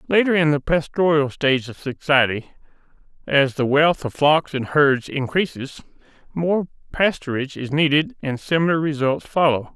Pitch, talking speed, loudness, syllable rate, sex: 145 Hz, 140 wpm, -20 LUFS, 4.9 syllables/s, male